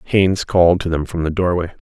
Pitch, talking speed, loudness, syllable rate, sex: 90 Hz, 225 wpm, -17 LUFS, 6.3 syllables/s, male